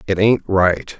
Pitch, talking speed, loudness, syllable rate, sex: 95 Hz, 180 wpm, -16 LUFS, 3.6 syllables/s, male